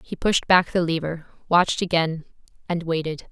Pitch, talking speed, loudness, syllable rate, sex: 170 Hz, 165 wpm, -22 LUFS, 4.9 syllables/s, female